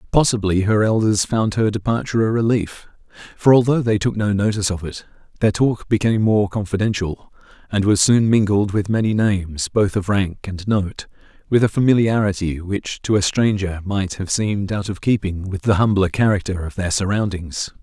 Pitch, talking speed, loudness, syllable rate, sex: 100 Hz, 180 wpm, -19 LUFS, 5.2 syllables/s, male